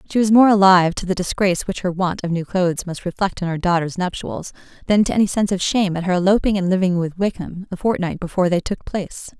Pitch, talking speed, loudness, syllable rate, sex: 185 Hz, 245 wpm, -19 LUFS, 6.5 syllables/s, female